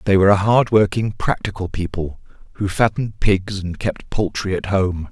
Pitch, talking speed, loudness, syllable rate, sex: 95 Hz, 165 wpm, -19 LUFS, 5.0 syllables/s, male